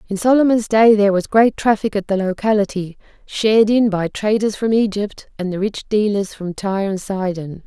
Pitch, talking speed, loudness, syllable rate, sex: 205 Hz, 190 wpm, -17 LUFS, 5.2 syllables/s, female